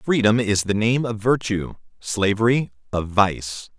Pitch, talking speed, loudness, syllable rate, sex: 110 Hz, 145 wpm, -21 LUFS, 4.0 syllables/s, male